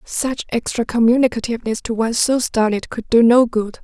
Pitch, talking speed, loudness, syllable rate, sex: 235 Hz, 170 wpm, -17 LUFS, 5.5 syllables/s, female